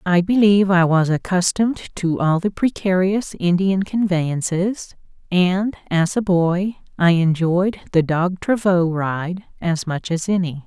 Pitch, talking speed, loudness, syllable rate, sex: 180 Hz, 140 wpm, -19 LUFS, 4.0 syllables/s, female